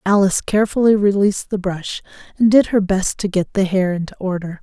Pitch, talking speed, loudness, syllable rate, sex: 195 Hz, 195 wpm, -17 LUFS, 5.8 syllables/s, female